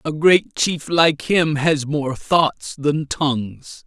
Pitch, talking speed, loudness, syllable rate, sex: 150 Hz, 155 wpm, -18 LUFS, 3.0 syllables/s, male